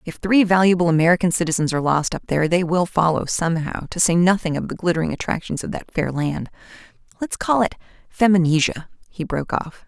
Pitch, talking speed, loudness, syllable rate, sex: 175 Hz, 175 wpm, -20 LUFS, 6.2 syllables/s, female